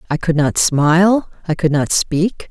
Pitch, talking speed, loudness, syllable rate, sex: 165 Hz, 190 wpm, -15 LUFS, 4.2 syllables/s, female